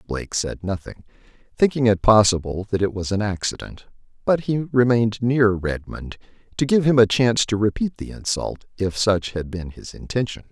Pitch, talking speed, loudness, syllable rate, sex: 110 Hz, 175 wpm, -21 LUFS, 5.2 syllables/s, male